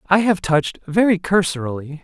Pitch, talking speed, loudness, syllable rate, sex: 175 Hz, 145 wpm, -18 LUFS, 5.4 syllables/s, male